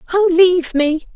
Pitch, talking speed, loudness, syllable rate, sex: 345 Hz, 155 wpm, -14 LUFS, 5.1 syllables/s, female